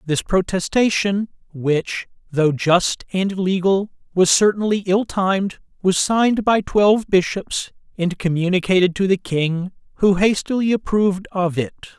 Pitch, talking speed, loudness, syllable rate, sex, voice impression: 190 Hz, 130 wpm, -19 LUFS, 4.4 syllables/s, male, masculine, adult-like, tensed, powerful, bright, soft, slightly raspy, slightly refreshing, friendly, unique, lively, intense